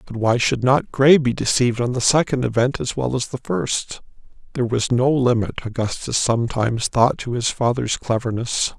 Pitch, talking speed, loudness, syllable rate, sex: 120 Hz, 185 wpm, -20 LUFS, 5.2 syllables/s, male